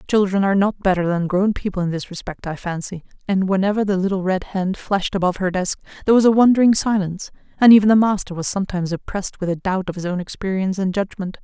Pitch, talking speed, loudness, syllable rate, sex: 190 Hz, 225 wpm, -19 LUFS, 6.8 syllables/s, female